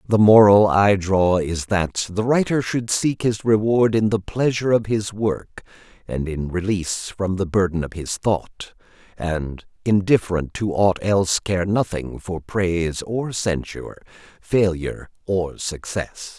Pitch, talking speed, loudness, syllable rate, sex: 100 Hz, 150 wpm, -20 LUFS, 4.1 syllables/s, male